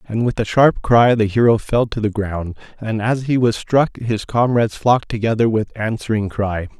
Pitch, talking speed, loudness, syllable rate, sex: 110 Hz, 205 wpm, -17 LUFS, 4.9 syllables/s, male